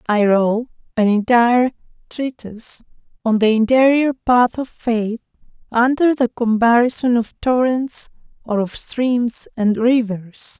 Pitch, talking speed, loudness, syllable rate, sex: 235 Hz, 120 wpm, -17 LUFS, 4.0 syllables/s, female